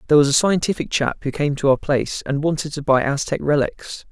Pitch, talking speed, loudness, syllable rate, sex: 145 Hz, 235 wpm, -20 LUFS, 6.1 syllables/s, male